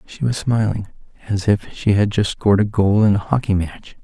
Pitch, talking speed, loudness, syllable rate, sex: 105 Hz, 225 wpm, -18 LUFS, 5.3 syllables/s, male